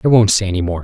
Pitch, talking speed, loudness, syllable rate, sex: 100 Hz, 360 wpm, -14 LUFS, 7.7 syllables/s, male